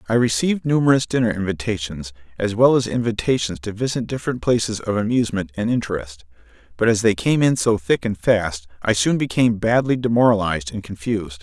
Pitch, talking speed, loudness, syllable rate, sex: 110 Hz, 175 wpm, -20 LUFS, 6.0 syllables/s, male